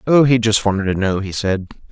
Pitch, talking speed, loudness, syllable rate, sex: 105 Hz, 250 wpm, -17 LUFS, 5.6 syllables/s, male